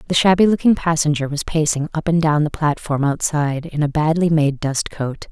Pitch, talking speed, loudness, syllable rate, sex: 155 Hz, 205 wpm, -18 LUFS, 5.3 syllables/s, female